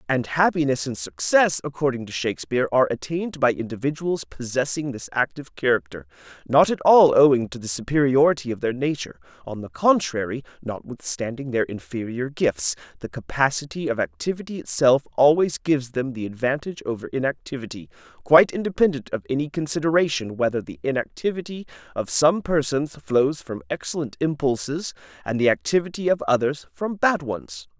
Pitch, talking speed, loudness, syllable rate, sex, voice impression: 135 Hz, 145 wpm, -22 LUFS, 5.6 syllables/s, male, masculine, adult-like, slightly fluent, slightly refreshing, sincere, friendly, slightly kind